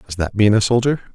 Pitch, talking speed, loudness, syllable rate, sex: 110 Hz, 265 wpm, -17 LUFS, 6.5 syllables/s, male